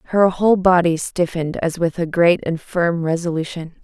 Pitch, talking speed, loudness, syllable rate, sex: 170 Hz, 170 wpm, -18 LUFS, 5.1 syllables/s, female